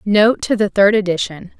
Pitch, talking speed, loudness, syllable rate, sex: 200 Hz, 190 wpm, -15 LUFS, 4.8 syllables/s, female